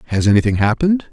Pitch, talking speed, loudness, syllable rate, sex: 125 Hz, 160 wpm, -15 LUFS, 8.1 syllables/s, male